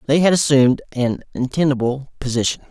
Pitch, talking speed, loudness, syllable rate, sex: 135 Hz, 135 wpm, -18 LUFS, 5.9 syllables/s, male